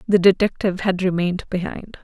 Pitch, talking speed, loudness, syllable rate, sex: 185 Hz, 150 wpm, -20 LUFS, 6.0 syllables/s, female